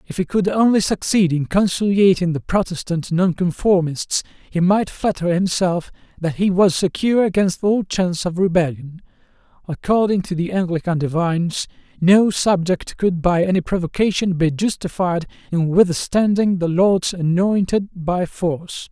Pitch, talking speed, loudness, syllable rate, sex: 180 Hz, 135 wpm, -18 LUFS, 4.6 syllables/s, male